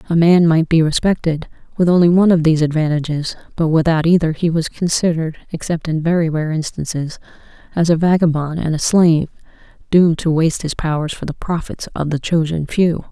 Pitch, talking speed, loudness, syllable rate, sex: 165 Hz, 185 wpm, -16 LUFS, 5.9 syllables/s, female